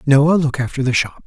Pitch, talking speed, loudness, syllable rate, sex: 140 Hz, 235 wpm, -16 LUFS, 5.3 syllables/s, male